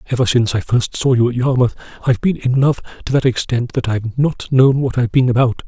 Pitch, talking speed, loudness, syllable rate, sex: 125 Hz, 245 wpm, -16 LUFS, 6.4 syllables/s, male